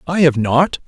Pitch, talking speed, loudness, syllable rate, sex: 150 Hz, 205 wpm, -15 LUFS, 4.4 syllables/s, male